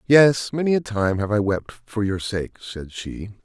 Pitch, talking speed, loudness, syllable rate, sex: 110 Hz, 210 wpm, -22 LUFS, 4.6 syllables/s, male